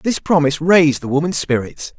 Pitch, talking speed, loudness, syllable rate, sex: 155 Hz, 180 wpm, -16 LUFS, 5.7 syllables/s, male